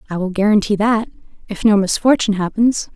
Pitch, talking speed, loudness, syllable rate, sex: 205 Hz, 165 wpm, -16 LUFS, 6.0 syllables/s, female